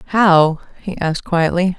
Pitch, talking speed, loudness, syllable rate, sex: 175 Hz, 135 wpm, -15 LUFS, 3.9 syllables/s, female